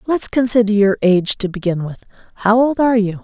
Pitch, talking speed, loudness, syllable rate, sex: 215 Hz, 185 wpm, -15 LUFS, 6.2 syllables/s, female